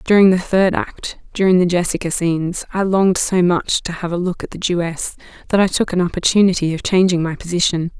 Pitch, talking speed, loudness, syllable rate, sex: 180 Hz, 210 wpm, -17 LUFS, 5.8 syllables/s, female